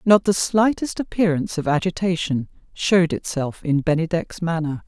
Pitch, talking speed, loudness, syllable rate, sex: 170 Hz, 135 wpm, -21 LUFS, 5.1 syllables/s, female